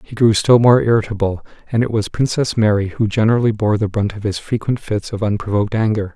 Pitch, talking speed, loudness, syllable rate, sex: 110 Hz, 215 wpm, -17 LUFS, 6.1 syllables/s, male